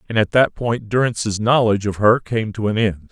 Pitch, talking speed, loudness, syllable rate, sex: 110 Hz, 230 wpm, -18 LUFS, 5.5 syllables/s, male